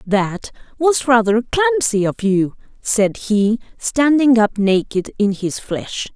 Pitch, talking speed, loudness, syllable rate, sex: 225 Hz, 135 wpm, -17 LUFS, 3.4 syllables/s, female